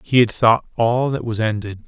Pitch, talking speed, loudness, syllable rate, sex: 115 Hz, 225 wpm, -18 LUFS, 4.8 syllables/s, male